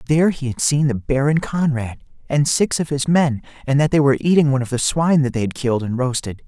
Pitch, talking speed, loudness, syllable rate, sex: 140 Hz, 250 wpm, -18 LUFS, 6.2 syllables/s, male